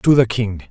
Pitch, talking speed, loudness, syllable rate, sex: 110 Hz, 255 wpm, -17 LUFS, 4.9 syllables/s, male